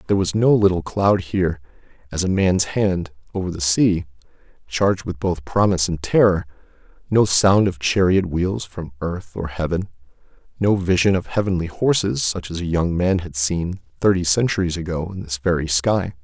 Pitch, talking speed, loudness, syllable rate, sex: 90 Hz, 175 wpm, -20 LUFS, 5.1 syllables/s, male